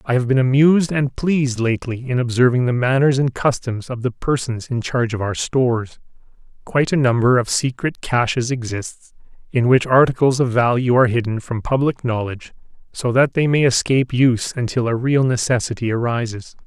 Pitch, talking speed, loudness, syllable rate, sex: 125 Hz, 175 wpm, -18 LUFS, 5.5 syllables/s, male